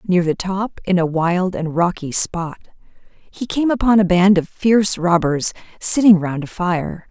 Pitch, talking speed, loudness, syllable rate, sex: 185 Hz, 175 wpm, -17 LUFS, 4.2 syllables/s, female